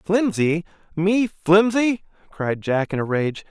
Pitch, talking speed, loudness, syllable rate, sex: 180 Hz, 135 wpm, -21 LUFS, 3.5 syllables/s, male